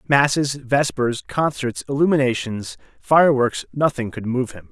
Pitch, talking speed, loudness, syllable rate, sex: 130 Hz, 115 wpm, -20 LUFS, 4.2 syllables/s, male